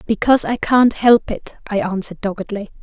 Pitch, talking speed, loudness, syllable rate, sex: 215 Hz, 170 wpm, -17 LUFS, 5.7 syllables/s, female